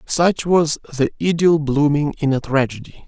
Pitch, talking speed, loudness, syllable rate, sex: 150 Hz, 155 wpm, -18 LUFS, 4.6 syllables/s, male